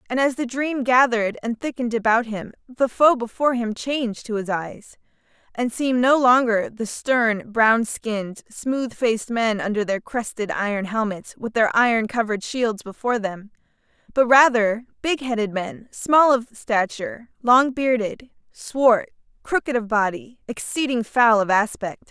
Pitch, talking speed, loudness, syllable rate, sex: 230 Hz, 155 wpm, -21 LUFS, 4.6 syllables/s, female